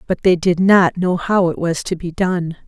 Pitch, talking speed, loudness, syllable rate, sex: 175 Hz, 245 wpm, -16 LUFS, 4.5 syllables/s, female